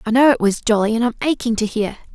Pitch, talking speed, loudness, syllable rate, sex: 230 Hz, 280 wpm, -18 LUFS, 6.7 syllables/s, female